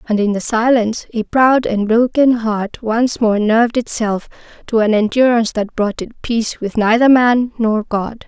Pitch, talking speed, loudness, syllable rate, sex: 225 Hz, 180 wpm, -15 LUFS, 4.6 syllables/s, female